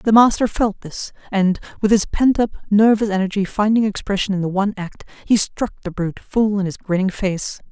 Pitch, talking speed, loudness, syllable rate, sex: 200 Hz, 200 wpm, -19 LUFS, 5.4 syllables/s, female